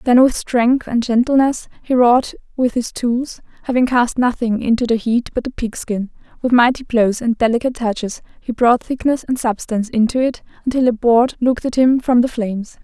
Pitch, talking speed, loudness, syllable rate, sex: 240 Hz, 195 wpm, -17 LUFS, 5.3 syllables/s, female